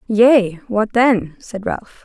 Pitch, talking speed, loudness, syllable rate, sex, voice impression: 220 Hz, 145 wpm, -16 LUFS, 2.8 syllables/s, female, feminine, adult-like, relaxed, slightly weak, soft, raspy, intellectual, calm, friendly, reassuring, elegant, kind, modest